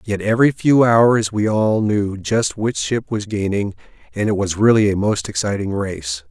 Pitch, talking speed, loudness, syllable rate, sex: 105 Hz, 190 wpm, -18 LUFS, 4.5 syllables/s, male